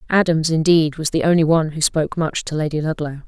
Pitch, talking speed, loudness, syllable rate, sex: 160 Hz, 220 wpm, -18 LUFS, 6.2 syllables/s, female